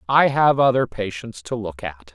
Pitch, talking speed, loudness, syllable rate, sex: 115 Hz, 195 wpm, -20 LUFS, 4.5 syllables/s, male